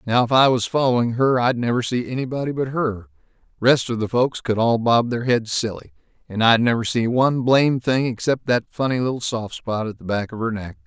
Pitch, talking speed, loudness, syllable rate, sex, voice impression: 120 Hz, 225 wpm, -20 LUFS, 5.6 syllables/s, male, masculine, adult-like, tensed, powerful, bright, clear, slightly halting, mature, friendly, wild, lively, slightly intense